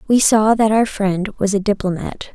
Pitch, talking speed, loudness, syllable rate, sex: 205 Hz, 205 wpm, -17 LUFS, 4.6 syllables/s, female